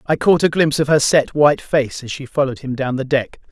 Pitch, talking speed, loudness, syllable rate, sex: 140 Hz, 275 wpm, -17 LUFS, 6.0 syllables/s, male